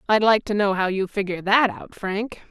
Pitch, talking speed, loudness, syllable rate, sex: 200 Hz, 240 wpm, -22 LUFS, 5.2 syllables/s, female